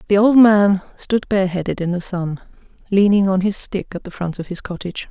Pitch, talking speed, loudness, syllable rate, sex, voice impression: 190 Hz, 210 wpm, -18 LUFS, 5.5 syllables/s, female, very feminine, slightly gender-neutral, slightly young, slightly adult-like, very thin, very relaxed, weak, slightly dark, hard, clear, fluent, cute, very intellectual, refreshing, very sincere, very calm, mature, very friendly, very reassuring, very unique, elegant, sweet, slightly lively